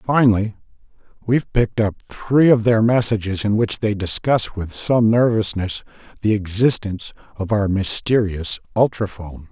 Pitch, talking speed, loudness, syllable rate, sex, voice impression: 105 Hz, 130 wpm, -19 LUFS, 4.8 syllables/s, male, very masculine, very middle-aged, thick, slightly relaxed, powerful, slightly dark, slightly soft, muffled, fluent, slightly raspy, cool, intellectual, slightly refreshing, sincere, calm, very mature, friendly, reassuring, very unique, slightly elegant, very wild, slightly sweet, lively, kind, slightly intense, slightly modest